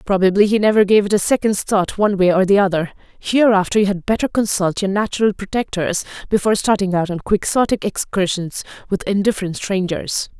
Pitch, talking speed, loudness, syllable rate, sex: 200 Hz, 175 wpm, -17 LUFS, 5.8 syllables/s, female